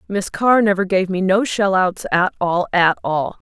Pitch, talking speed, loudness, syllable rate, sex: 190 Hz, 205 wpm, -17 LUFS, 4.3 syllables/s, female